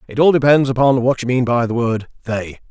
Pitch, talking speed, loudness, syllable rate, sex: 125 Hz, 245 wpm, -16 LUFS, 5.7 syllables/s, male